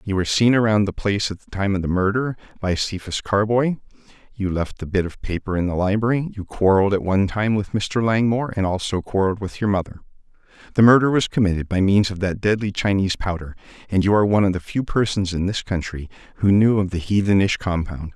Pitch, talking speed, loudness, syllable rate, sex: 100 Hz, 220 wpm, -20 LUFS, 6.2 syllables/s, male